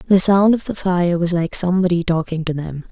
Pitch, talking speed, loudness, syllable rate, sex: 175 Hz, 225 wpm, -17 LUFS, 5.6 syllables/s, female